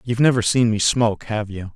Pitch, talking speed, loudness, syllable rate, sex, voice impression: 110 Hz, 240 wpm, -19 LUFS, 6.1 syllables/s, male, masculine, adult-like, tensed, powerful, bright, raspy, intellectual, slightly mature, friendly, wild, lively, slightly light